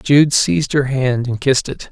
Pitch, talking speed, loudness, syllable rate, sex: 135 Hz, 220 wpm, -16 LUFS, 4.8 syllables/s, male